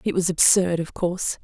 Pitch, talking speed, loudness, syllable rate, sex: 180 Hz, 210 wpm, -20 LUFS, 5.4 syllables/s, female